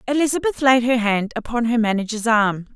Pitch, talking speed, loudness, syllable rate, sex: 235 Hz, 175 wpm, -19 LUFS, 5.6 syllables/s, female